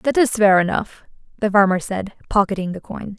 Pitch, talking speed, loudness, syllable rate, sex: 200 Hz, 190 wpm, -19 LUFS, 5.3 syllables/s, female